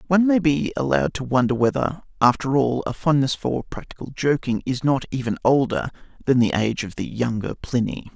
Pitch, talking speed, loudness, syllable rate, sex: 130 Hz, 185 wpm, -22 LUFS, 5.6 syllables/s, male